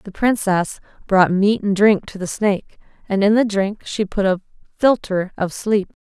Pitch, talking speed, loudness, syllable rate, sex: 200 Hz, 190 wpm, -19 LUFS, 4.5 syllables/s, female